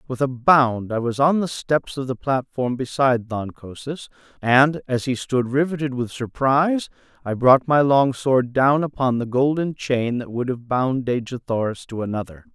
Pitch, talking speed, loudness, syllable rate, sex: 130 Hz, 185 wpm, -21 LUFS, 4.6 syllables/s, male